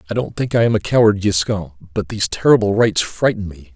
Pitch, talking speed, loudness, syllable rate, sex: 100 Hz, 225 wpm, -17 LUFS, 6.0 syllables/s, male